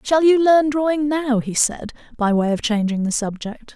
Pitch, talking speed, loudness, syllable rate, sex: 255 Hz, 210 wpm, -18 LUFS, 4.7 syllables/s, female